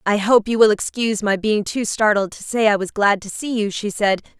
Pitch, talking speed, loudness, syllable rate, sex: 210 Hz, 260 wpm, -19 LUFS, 5.3 syllables/s, female